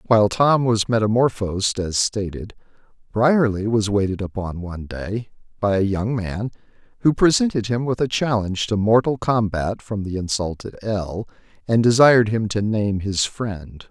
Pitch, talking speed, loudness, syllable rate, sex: 105 Hz, 155 wpm, -20 LUFS, 4.7 syllables/s, male